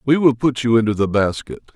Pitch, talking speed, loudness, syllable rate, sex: 120 Hz, 240 wpm, -17 LUFS, 6.0 syllables/s, male